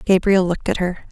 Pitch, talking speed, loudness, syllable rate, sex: 185 Hz, 215 wpm, -18 LUFS, 6.7 syllables/s, female